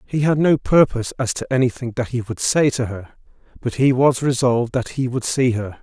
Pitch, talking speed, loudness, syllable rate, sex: 125 Hz, 225 wpm, -19 LUFS, 5.5 syllables/s, male